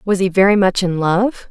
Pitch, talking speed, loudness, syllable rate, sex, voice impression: 190 Hz, 240 wpm, -15 LUFS, 5.0 syllables/s, female, feminine, adult-like, tensed, clear, fluent, intellectual, calm, reassuring, elegant, slightly strict, slightly sharp